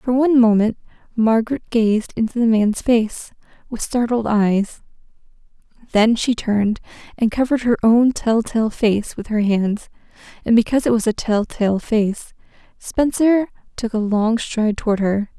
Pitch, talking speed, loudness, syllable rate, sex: 225 Hz, 145 wpm, -18 LUFS, 4.8 syllables/s, female